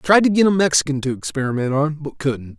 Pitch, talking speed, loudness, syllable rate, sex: 150 Hz, 255 wpm, -19 LUFS, 6.3 syllables/s, male